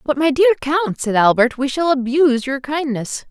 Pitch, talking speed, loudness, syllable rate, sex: 275 Hz, 200 wpm, -17 LUFS, 5.0 syllables/s, female